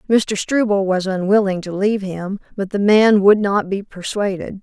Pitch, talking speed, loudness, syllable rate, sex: 200 Hz, 180 wpm, -17 LUFS, 4.7 syllables/s, female